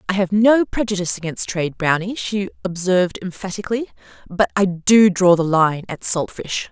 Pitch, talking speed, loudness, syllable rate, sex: 190 Hz, 170 wpm, -18 LUFS, 5.2 syllables/s, female